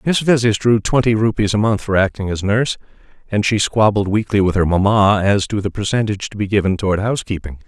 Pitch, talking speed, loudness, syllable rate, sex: 105 Hz, 210 wpm, -17 LUFS, 6.2 syllables/s, male